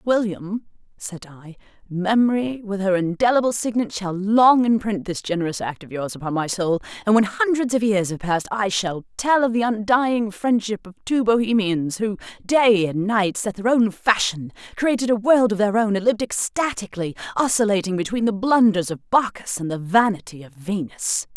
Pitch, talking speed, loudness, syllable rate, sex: 210 Hz, 180 wpm, -21 LUFS, 5.0 syllables/s, female